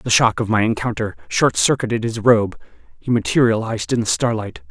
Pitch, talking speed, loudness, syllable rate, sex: 110 Hz, 180 wpm, -18 LUFS, 5.6 syllables/s, male